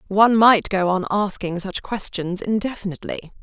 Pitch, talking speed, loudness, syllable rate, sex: 195 Hz, 140 wpm, -20 LUFS, 5.1 syllables/s, female